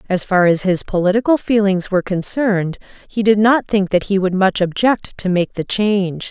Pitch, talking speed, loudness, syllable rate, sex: 195 Hz, 200 wpm, -16 LUFS, 5.2 syllables/s, female